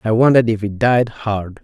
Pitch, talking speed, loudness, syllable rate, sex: 110 Hz, 220 wpm, -16 LUFS, 4.7 syllables/s, male